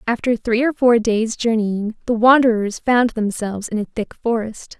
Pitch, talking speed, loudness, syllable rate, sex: 225 Hz, 175 wpm, -18 LUFS, 4.6 syllables/s, female